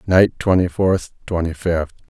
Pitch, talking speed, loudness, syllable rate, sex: 90 Hz, 110 wpm, -19 LUFS, 4.2 syllables/s, male